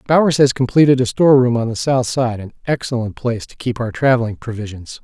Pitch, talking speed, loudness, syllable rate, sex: 125 Hz, 205 wpm, -17 LUFS, 6.1 syllables/s, male